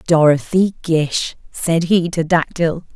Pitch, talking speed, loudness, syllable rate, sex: 165 Hz, 120 wpm, -17 LUFS, 3.6 syllables/s, female